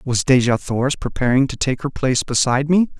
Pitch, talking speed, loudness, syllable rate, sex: 130 Hz, 200 wpm, -18 LUFS, 6.0 syllables/s, male